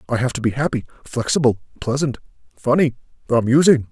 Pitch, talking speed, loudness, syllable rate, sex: 125 Hz, 140 wpm, -19 LUFS, 6.1 syllables/s, male